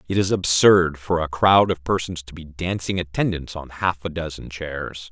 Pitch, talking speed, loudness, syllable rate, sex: 85 Hz, 200 wpm, -21 LUFS, 4.9 syllables/s, male